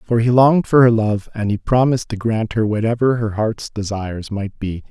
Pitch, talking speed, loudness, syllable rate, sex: 110 Hz, 220 wpm, -18 LUFS, 5.5 syllables/s, male